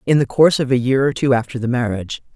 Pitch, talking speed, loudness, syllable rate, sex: 130 Hz, 280 wpm, -17 LUFS, 7.1 syllables/s, female